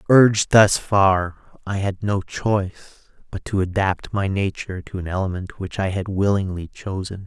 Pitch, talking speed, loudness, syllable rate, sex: 95 Hz, 165 wpm, -21 LUFS, 4.8 syllables/s, male